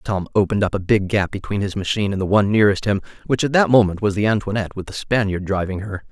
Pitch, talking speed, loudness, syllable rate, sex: 100 Hz, 255 wpm, -19 LUFS, 7.0 syllables/s, male